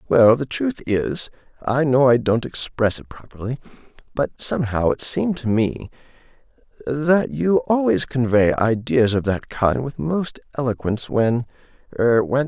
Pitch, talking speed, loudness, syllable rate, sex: 125 Hz, 140 wpm, -20 LUFS, 4.5 syllables/s, male